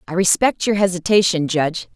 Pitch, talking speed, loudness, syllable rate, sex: 180 Hz, 155 wpm, -17 LUFS, 5.8 syllables/s, female